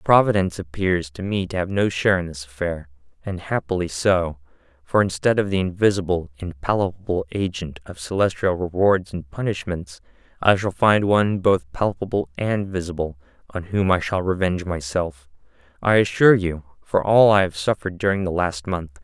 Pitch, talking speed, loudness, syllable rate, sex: 90 Hz, 165 wpm, -21 LUFS, 5.2 syllables/s, male